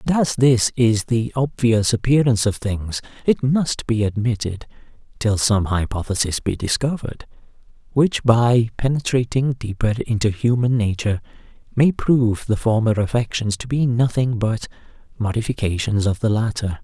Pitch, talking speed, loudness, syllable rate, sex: 115 Hz, 135 wpm, -20 LUFS, 4.8 syllables/s, male